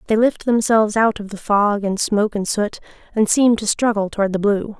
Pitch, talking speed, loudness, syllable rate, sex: 210 Hz, 225 wpm, -18 LUFS, 5.4 syllables/s, female